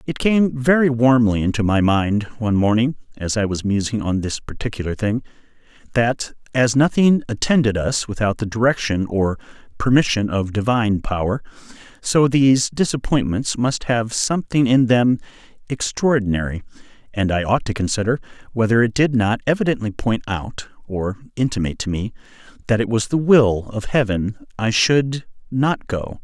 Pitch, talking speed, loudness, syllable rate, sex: 115 Hz, 150 wpm, -19 LUFS, 5.0 syllables/s, male